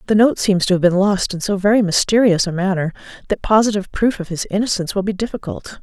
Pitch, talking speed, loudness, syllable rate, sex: 200 Hz, 225 wpm, -17 LUFS, 6.4 syllables/s, female